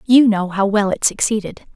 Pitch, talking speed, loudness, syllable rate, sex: 210 Hz, 205 wpm, -16 LUFS, 5.1 syllables/s, female